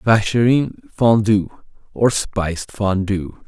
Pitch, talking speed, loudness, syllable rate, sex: 105 Hz, 85 wpm, -18 LUFS, 3.5 syllables/s, male